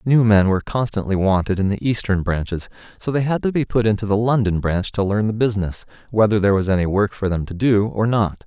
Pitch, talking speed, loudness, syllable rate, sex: 105 Hz, 240 wpm, -19 LUFS, 6.0 syllables/s, male